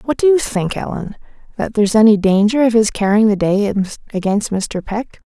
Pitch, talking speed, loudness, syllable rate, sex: 215 Hz, 195 wpm, -16 LUFS, 4.9 syllables/s, female